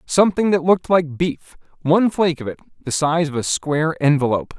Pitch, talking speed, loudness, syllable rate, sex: 155 Hz, 195 wpm, -19 LUFS, 6.1 syllables/s, male